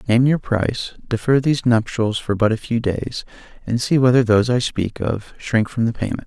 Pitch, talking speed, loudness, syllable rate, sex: 115 Hz, 210 wpm, -19 LUFS, 5.3 syllables/s, male